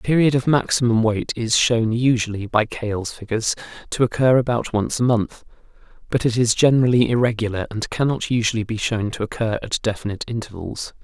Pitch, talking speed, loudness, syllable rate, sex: 115 Hz, 175 wpm, -20 LUFS, 5.7 syllables/s, male